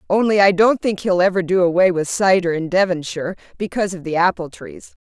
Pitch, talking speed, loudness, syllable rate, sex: 185 Hz, 205 wpm, -17 LUFS, 5.9 syllables/s, female